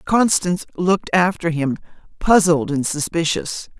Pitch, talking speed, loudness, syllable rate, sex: 170 Hz, 110 wpm, -19 LUFS, 4.6 syllables/s, female